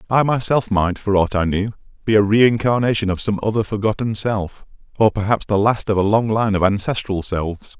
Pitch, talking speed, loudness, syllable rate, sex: 105 Hz, 200 wpm, -18 LUFS, 5.3 syllables/s, male